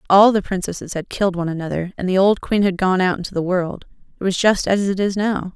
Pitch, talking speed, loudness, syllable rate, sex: 190 Hz, 260 wpm, -19 LUFS, 6.1 syllables/s, female